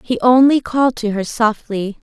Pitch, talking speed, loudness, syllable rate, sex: 230 Hz, 170 wpm, -16 LUFS, 4.8 syllables/s, female